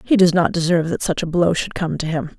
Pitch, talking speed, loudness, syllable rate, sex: 170 Hz, 300 wpm, -19 LUFS, 6.1 syllables/s, female